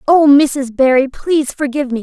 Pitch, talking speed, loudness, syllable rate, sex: 275 Hz, 180 wpm, -13 LUFS, 5.2 syllables/s, female